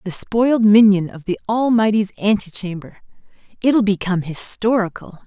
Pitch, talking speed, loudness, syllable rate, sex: 205 Hz, 125 wpm, -17 LUFS, 5.2 syllables/s, female